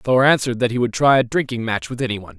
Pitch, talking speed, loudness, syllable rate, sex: 125 Hz, 300 wpm, -18 LUFS, 7.2 syllables/s, male